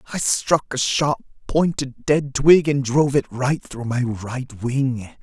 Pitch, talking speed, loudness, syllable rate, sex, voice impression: 135 Hz, 170 wpm, -20 LUFS, 3.7 syllables/s, male, masculine, adult-like, tensed, slightly powerful, slightly soft, cool, slightly intellectual, calm, friendly, slightly wild, lively, slightly kind